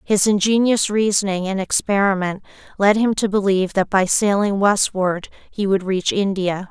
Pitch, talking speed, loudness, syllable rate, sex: 200 Hz, 150 wpm, -18 LUFS, 4.7 syllables/s, female